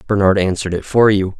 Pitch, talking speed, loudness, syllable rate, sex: 95 Hz, 215 wpm, -15 LUFS, 6.6 syllables/s, male